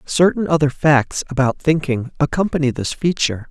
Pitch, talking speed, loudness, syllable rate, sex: 145 Hz, 135 wpm, -18 LUFS, 5.2 syllables/s, male